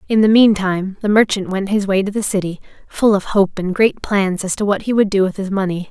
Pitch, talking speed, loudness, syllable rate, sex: 200 Hz, 265 wpm, -16 LUFS, 5.7 syllables/s, female